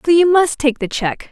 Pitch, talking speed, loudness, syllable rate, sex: 295 Hz, 275 wpm, -15 LUFS, 5.0 syllables/s, female